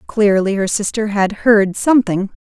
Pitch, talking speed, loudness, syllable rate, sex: 205 Hz, 150 wpm, -15 LUFS, 4.5 syllables/s, female